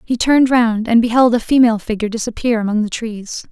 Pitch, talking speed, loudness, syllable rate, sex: 230 Hz, 205 wpm, -15 LUFS, 6.2 syllables/s, female